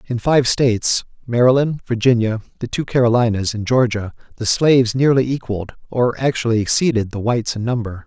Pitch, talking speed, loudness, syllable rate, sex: 120 Hz, 140 wpm, -18 LUFS, 5.6 syllables/s, male